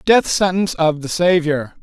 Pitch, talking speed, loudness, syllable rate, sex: 165 Hz, 165 wpm, -17 LUFS, 4.8 syllables/s, male